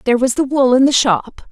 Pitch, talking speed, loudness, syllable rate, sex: 255 Hz, 275 wpm, -14 LUFS, 5.8 syllables/s, female